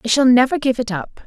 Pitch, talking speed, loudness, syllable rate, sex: 250 Hz, 285 wpm, -16 LUFS, 6.1 syllables/s, female